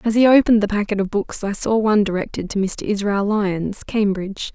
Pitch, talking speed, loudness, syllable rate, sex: 205 Hz, 210 wpm, -19 LUFS, 5.7 syllables/s, female